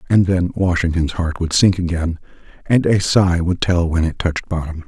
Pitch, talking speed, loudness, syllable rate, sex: 85 Hz, 195 wpm, -18 LUFS, 5.0 syllables/s, male